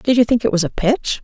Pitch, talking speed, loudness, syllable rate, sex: 225 Hz, 340 wpm, -17 LUFS, 5.9 syllables/s, female